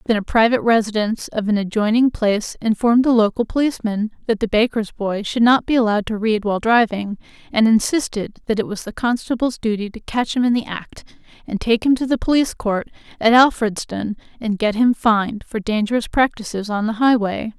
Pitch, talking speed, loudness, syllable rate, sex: 225 Hz, 195 wpm, -19 LUFS, 5.7 syllables/s, female